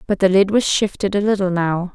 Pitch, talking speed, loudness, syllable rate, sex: 195 Hz, 245 wpm, -17 LUFS, 5.5 syllables/s, female